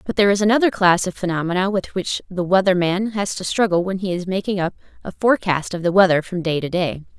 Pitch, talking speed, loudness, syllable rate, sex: 185 Hz, 240 wpm, -19 LUFS, 6.2 syllables/s, female